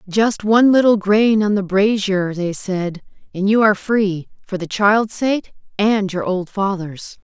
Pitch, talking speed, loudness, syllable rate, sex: 200 Hz, 170 wpm, -17 LUFS, 4.1 syllables/s, female